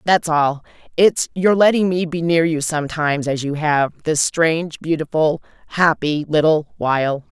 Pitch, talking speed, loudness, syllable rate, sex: 155 Hz, 155 wpm, -18 LUFS, 4.6 syllables/s, female